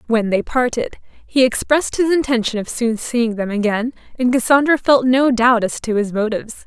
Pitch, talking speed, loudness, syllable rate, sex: 240 Hz, 190 wpm, -17 LUFS, 5.2 syllables/s, female